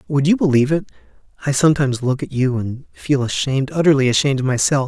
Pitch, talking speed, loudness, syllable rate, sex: 140 Hz, 195 wpm, -18 LUFS, 6.8 syllables/s, male